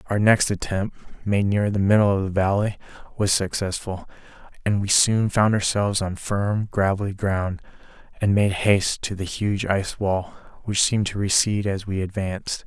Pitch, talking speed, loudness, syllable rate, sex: 100 Hz, 170 wpm, -22 LUFS, 4.9 syllables/s, male